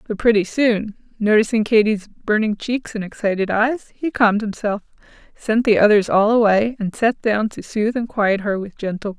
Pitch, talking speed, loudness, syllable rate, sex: 215 Hz, 190 wpm, -19 LUFS, 5.0 syllables/s, female